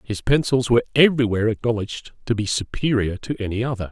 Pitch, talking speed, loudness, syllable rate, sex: 115 Hz, 170 wpm, -21 LUFS, 6.7 syllables/s, male